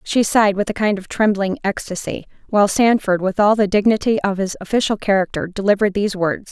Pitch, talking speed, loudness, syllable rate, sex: 200 Hz, 195 wpm, -18 LUFS, 6.1 syllables/s, female